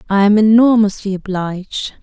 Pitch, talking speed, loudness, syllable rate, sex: 205 Hz, 120 wpm, -14 LUFS, 4.9 syllables/s, female